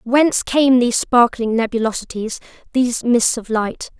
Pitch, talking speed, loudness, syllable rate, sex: 240 Hz, 135 wpm, -17 LUFS, 4.9 syllables/s, female